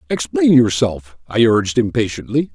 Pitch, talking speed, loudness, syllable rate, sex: 110 Hz, 120 wpm, -16 LUFS, 5.0 syllables/s, male